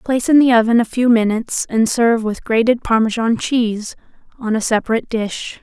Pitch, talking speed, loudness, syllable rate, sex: 230 Hz, 180 wpm, -16 LUFS, 5.7 syllables/s, female